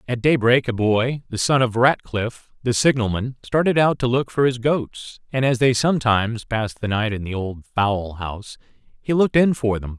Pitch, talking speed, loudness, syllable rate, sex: 120 Hz, 205 wpm, -20 LUFS, 5.1 syllables/s, male